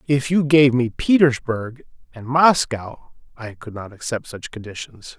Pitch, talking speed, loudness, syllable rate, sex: 125 Hz, 150 wpm, -18 LUFS, 4.2 syllables/s, male